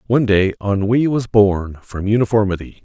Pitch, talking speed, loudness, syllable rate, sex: 105 Hz, 150 wpm, -17 LUFS, 5.2 syllables/s, male